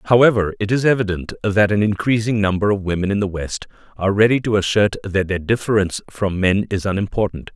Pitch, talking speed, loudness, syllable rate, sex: 100 Hz, 190 wpm, -18 LUFS, 6.0 syllables/s, male